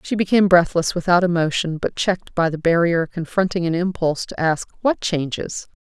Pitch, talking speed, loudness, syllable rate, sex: 175 Hz, 175 wpm, -20 LUFS, 5.5 syllables/s, female